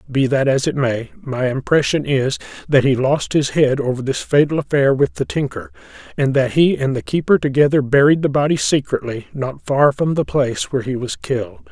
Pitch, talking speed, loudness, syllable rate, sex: 140 Hz, 205 wpm, -17 LUFS, 5.3 syllables/s, male